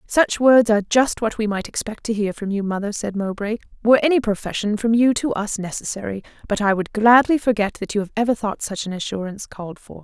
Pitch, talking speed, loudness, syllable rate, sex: 215 Hz, 225 wpm, -20 LUFS, 6.0 syllables/s, female